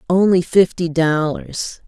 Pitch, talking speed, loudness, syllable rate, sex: 170 Hz, 95 wpm, -17 LUFS, 3.6 syllables/s, female